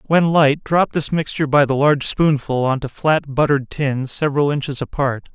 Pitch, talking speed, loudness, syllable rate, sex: 140 Hz, 190 wpm, -18 LUFS, 5.3 syllables/s, male